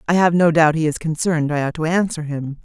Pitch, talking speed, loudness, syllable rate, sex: 160 Hz, 275 wpm, -18 LUFS, 6.2 syllables/s, female